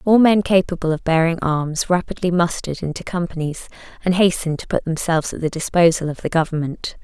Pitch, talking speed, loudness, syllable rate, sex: 170 Hz, 180 wpm, -19 LUFS, 6.0 syllables/s, female